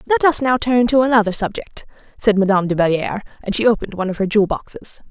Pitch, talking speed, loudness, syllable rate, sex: 220 Hz, 225 wpm, -17 LUFS, 7.1 syllables/s, female